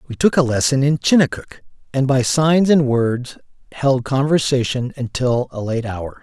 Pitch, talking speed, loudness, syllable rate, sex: 130 Hz, 165 wpm, -18 LUFS, 4.3 syllables/s, male